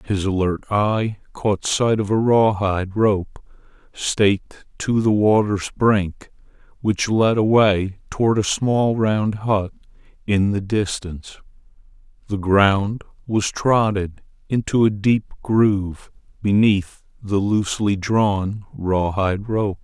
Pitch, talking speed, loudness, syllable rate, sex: 105 Hz, 120 wpm, -20 LUFS, 3.6 syllables/s, male